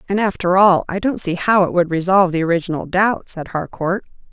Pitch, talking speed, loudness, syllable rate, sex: 185 Hz, 210 wpm, -17 LUFS, 5.8 syllables/s, female